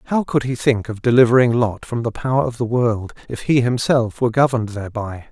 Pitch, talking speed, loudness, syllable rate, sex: 120 Hz, 215 wpm, -18 LUFS, 5.9 syllables/s, male